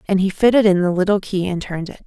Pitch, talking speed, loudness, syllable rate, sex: 190 Hz, 290 wpm, -18 LUFS, 6.8 syllables/s, female